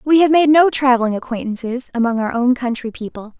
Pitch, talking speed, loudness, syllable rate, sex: 250 Hz, 195 wpm, -16 LUFS, 5.9 syllables/s, female